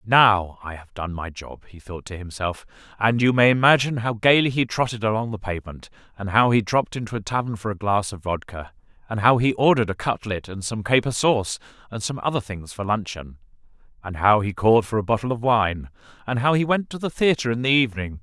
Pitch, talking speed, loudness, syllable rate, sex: 110 Hz, 225 wpm, -21 LUFS, 5.9 syllables/s, male